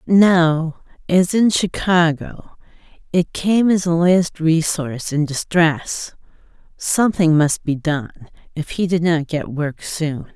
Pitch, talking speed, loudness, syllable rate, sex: 165 Hz, 135 wpm, -18 LUFS, 3.6 syllables/s, female